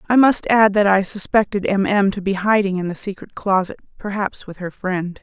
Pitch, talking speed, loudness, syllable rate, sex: 195 Hz, 220 wpm, -18 LUFS, 5.2 syllables/s, female